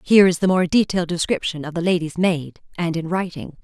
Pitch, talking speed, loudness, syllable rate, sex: 170 Hz, 215 wpm, -20 LUFS, 6.0 syllables/s, female